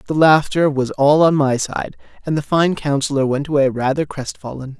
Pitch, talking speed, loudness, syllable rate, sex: 145 Hz, 190 wpm, -17 LUFS, 5.1 syllables/s, male